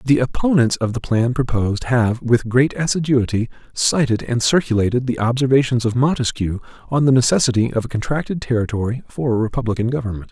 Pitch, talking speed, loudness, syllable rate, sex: 125 Hz, 165 wpm, -18 LUFS, 5.9 syllables/s, male